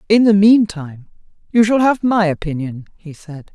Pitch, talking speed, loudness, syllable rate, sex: 190 Hz, 170 wpm, -15 LUFS, 4.9 syllables/s, female